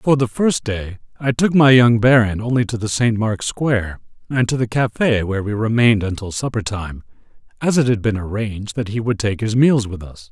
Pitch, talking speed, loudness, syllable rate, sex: 115 Hz, 220 wpm, -18 LUFS, 5.3 syllables/s, male